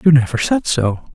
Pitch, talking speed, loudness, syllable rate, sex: 135 Hz, 210 wpm, -16 LUFS, 5.2 syllables/s, male